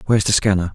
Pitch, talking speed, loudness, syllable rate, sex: 95 Hz, 240 wpm, -17 LUFS, 8.3 syllables/s, male